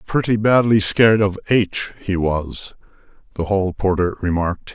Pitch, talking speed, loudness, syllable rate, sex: 100 Hz, 125 wpm, -18 LUFS, 4.2 syllables/s, male